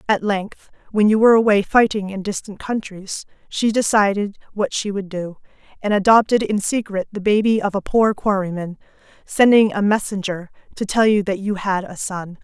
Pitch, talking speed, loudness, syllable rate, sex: 200 Hz, 180 wpm, -19 LUFS, 5.0 syllables/s, female